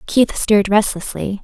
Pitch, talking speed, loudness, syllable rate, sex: 205 Hz, 125 wpm, -16 LUFS, 4.7 syllables/s, female